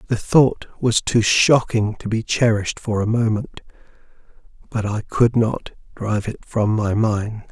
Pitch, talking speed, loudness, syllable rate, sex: 110 Hz, 160 wpm, -19 LUFS, 4.3 syllables/s, male